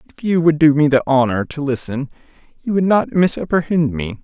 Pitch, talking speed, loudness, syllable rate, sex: 150 Hz, 200 wpm, -17 LUFS, 5.8 syllables/s, male